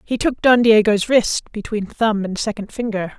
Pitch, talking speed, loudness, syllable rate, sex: 215 Hz, 190 wpm, -18 LUFS, 4.6 syllables/s, female